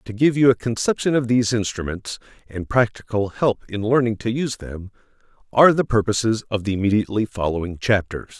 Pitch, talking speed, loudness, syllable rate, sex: 110 Hz, 170 wpm, -20 LUFS, 5.9 syllables/s, male